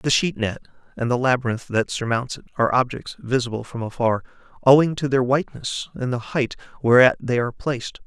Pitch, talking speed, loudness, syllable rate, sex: 125 Hz, 185 wpm, -21 LUFS, 5.8 syllables/s, male